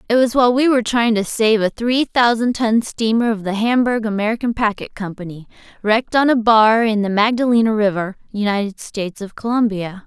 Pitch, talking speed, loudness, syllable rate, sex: 220 Hz, 185 wpm, -17 LUFS, 5.5 syllables/s, female